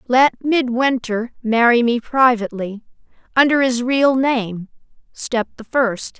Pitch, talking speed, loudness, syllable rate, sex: 240 Hz, 105 wpm, -17 LUFS, 3.9 syllables/s, female